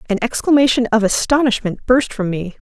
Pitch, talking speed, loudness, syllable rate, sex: 230 Hz, 155 wpm, -16 LUFS, 5.7 syllables/s, female